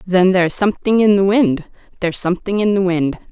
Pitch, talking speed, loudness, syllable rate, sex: 190 Hz, 180 wpm, -16 LUFS, 6.1 syllables/s, female